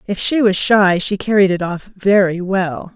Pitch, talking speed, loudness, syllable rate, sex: 190 Hz, 205 wpm, -15 LUFS, 4.3 syllables/s, female